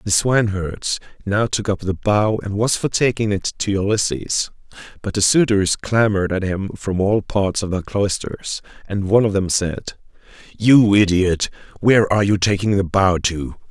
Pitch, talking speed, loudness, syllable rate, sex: 100 Hz, 175 wpm, -18 LUFS, 4.7 syllables/s, male